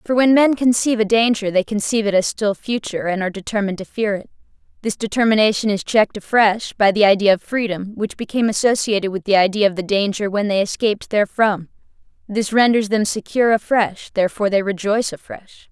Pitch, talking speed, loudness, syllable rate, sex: 210 Hz, 190 wpm, -18 LUFS, 6.3 syllables/s, female